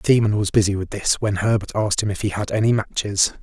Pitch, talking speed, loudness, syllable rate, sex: 105 Hz, 260 wpm, -20 LUFS, 6.4 syllables/s, male